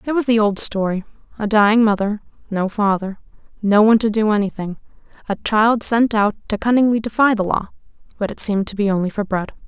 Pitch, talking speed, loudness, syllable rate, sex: 210 Hz, 175 wpm, -18 LUFS, 5.9 syllables/s, female